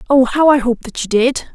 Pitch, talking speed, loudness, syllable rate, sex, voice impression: 250 Hz, 275 wpm, -14 LUFS, 5.4 syllables/s, female, feminine, slightly adult-like, fluent, friendly, slightly elegant, slightly sweet